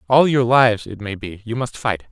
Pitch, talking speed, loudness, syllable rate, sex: 115 Hz, 255 wpm, -18 LUFS, 5.4 syllables/s, male